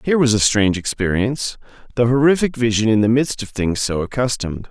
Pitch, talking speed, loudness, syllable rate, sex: 115 Hz, 180 wpm, -18 LUFS, 6.1 syllables/s, male